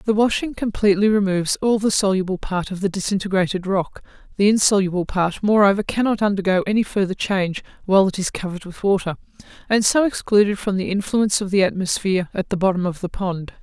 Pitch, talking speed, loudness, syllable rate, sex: 195 Hz, 185 wpm, -20 LUFS, 6.3 syllables/s, female